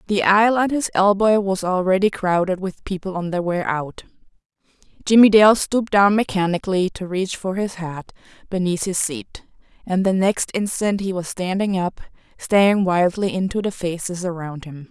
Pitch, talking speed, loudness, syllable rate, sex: 190 Hz, 165 wpm, -19 LUFS, 4.9 syllables/s, female